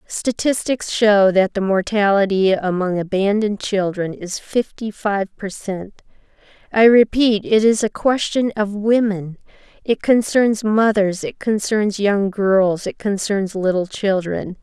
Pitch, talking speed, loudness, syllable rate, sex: 205 Hz, 130 wpm, -18 LUFS, 3.9 syllables/s, female